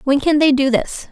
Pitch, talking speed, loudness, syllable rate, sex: 280 Hz, 270 wpm, -15 LUFS, 5.0 syllables/s, female